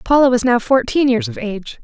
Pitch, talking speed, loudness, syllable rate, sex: 250 Hz, 230 wpm, -16 LUFS, 5.9 syllables/s, female